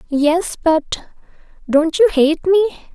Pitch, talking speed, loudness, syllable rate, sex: 330 Hz, 100 wpm, -16 LUFS, 3.6 syllables/s, female